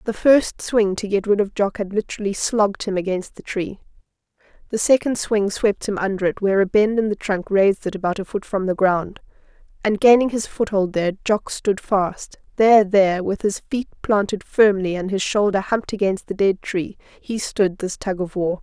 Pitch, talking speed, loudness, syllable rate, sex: 200 Hz, 205 wpm, -20 LUFS, 5.2 syllables/s, female